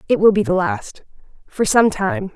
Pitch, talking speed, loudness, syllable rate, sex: 205 Hz, 180 wpm, -17 LUFS, 4.6 syllables/s, female